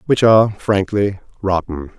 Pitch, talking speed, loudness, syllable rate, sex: 100 Hz, 120 wpm, -16 LUFS, 4.4 syllables/s, male